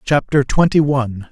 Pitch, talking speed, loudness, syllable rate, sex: 135 Hz, 135 wpm, -16 LUFS, 5.0 syllables/s, male